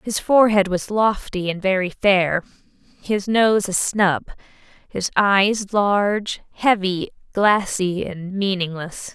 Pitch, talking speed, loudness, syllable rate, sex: 195 Hz, 120 wpm, -19 LUFS, 3.6 syllables/s, female